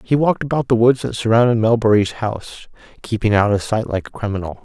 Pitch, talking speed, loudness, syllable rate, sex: 115 Hz, 205 wpm, -17 LUFS, 6.2 syllables/s, male